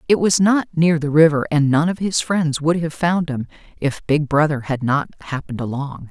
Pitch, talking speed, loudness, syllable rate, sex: 155 Hz, 215 wpm, -19 LUFS, 5.0 syllables/s, female